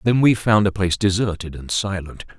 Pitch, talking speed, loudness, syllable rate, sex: 100 Hz, 200 wpm, -20 LUFS, 5.5 syllables/s, male